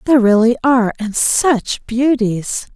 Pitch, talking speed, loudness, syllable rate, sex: 235 Hz, 110 wpm, -15 LUFS, 4.2 syllables/s, female